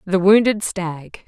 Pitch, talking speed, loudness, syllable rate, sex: 190 Hz, 140 wpm, -17 LUFS, 3.5 syllables/s, female